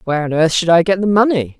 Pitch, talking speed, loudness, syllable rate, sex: 175 Hz, 300 wpm, -14 LUFS, 6.8 syllables/s, female